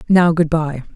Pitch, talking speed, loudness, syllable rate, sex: 160 Hz, 190 wpm, -16 LUFS, 4.2 syllables/s, female